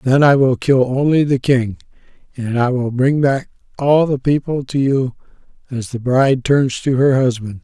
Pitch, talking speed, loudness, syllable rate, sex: 130 Hz, 190 wpm, -16 LUFS, 4.6 syllables/s, male